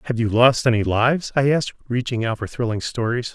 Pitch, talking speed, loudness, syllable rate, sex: 120 Hz, 215 wpm, -20 LUFS, 6.1 syllables/s, male